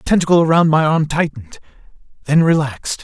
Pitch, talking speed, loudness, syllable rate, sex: 155 Hz, 160 wpm, -15 LUFS, 6.9 syllables/s, male